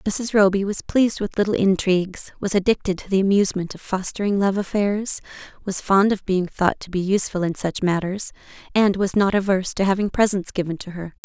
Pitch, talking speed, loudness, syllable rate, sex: 195 Hz, 200 wpm, -21 LUFS, 5.7 syllables/s, female